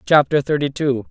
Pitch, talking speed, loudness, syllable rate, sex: 140 Hz, 165 wpm, -18 LUFS, 4.2 syllables/s, male